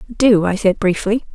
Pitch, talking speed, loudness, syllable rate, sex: 205 Hz, 180 wpm, -16 LUFS, 4.6 syllables/s, female